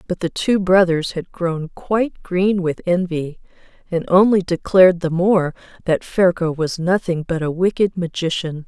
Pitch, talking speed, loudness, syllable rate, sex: 175 Hz, 160 wpm, -18 LUFS, 4.5 syllables/s, female